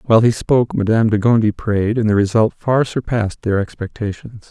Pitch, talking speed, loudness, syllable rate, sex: 110 Hz, 185 wpm, -17 LUFS, 5.8 syllables/s, male